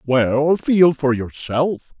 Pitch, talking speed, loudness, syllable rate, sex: 140 Hz, 120 wpm, -18 LUFS, 2.7 syllables/s, male